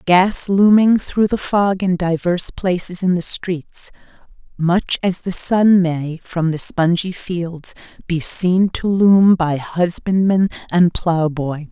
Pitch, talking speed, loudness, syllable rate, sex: 180 Hz, 145 wpm, -17 LUFS, 3.4 syllables/s, female